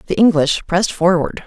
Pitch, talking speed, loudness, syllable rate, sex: 175 Hz, 165 wpm, -15 LUFS, 5.4 syllables/s, female